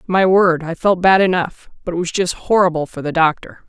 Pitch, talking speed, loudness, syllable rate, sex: 175 Hz, 230 wpm, -16 LUFS, 5.3 syllables/s, female